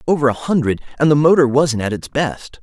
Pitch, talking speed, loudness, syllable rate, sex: 140 Hz, 230 wpm, -16 LUFS, 5.6 syllables/s, male